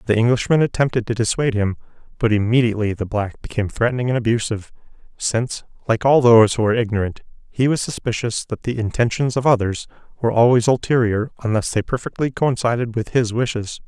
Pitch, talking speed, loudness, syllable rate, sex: 115 Hz, 170 wpm, -19 LUFS, 6.4 syllables/s, male